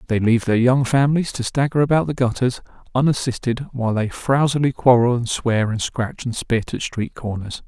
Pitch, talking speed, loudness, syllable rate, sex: 125 Hz, 190 wpm, -20 LUFS, 5.4 syllables/s, male